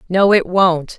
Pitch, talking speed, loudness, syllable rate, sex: 180 Hz, 185 wpm, -14 LUFS, 3.7 syllables/s, female